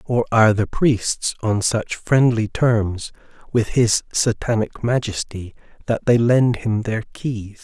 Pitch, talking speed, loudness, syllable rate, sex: 115 Hz, 140 wpm, -19 LUFS, 3.7 syllables/s, male